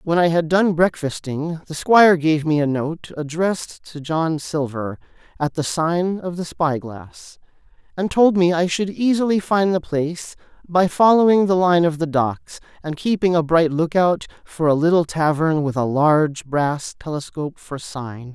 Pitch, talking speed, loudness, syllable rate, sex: 165 Hz, 175 wpm, -19 LUFS, 4.5 syllables/s, male